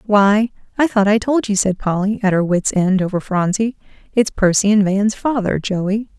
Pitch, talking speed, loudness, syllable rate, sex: 205 Hz, 195 wpm, -17 LUFS, 4.7 syllables/s, female